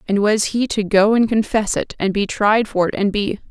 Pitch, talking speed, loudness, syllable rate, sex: 210 Hz, 255 wpm, -18 LUFS, 5.0 syllables/s, female